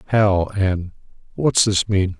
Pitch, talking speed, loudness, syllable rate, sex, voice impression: 95 Hz, 110 wpm, -19 LUFS, 3.3 syllables/s, male, masculine, adult-like, thick, slightly powerful, slightly hard, cool, intellectual, sincere, wild, slightly kind